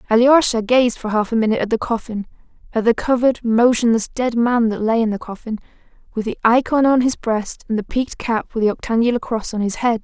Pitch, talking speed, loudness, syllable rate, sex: 230 Hz, 220 wpm, -18 LUFS, 6.0 syllables/s, female